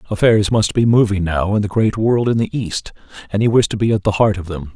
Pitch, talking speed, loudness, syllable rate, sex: 105 Hz, 275 wpm, -16 LUFS, 5.8 syllables/s, male